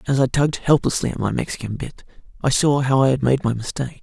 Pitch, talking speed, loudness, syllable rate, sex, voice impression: 130 Hz, 240 wpm, -20 LUFS, 6.6 syllables/s, male, masculine, adult-like, weak, slightly dark, muffled, halting, slightly cool, sincere, calm, slightly friendly, slightly reassuring, unique, slightly wild, kind, slightly modest